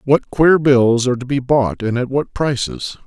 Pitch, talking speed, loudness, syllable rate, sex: 130 Hz, 215 wpm, -16 LUFS, 4.5 syllables/s, male